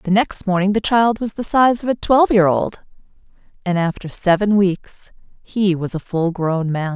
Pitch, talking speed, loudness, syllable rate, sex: 195 Hz, 200 wpm, -18 LUFS, 4.6 syllables/s, female